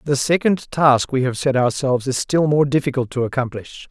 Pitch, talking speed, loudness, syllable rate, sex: 135 Hz, 200 wpm, -18 LUFS, 5.3 syllables/s, male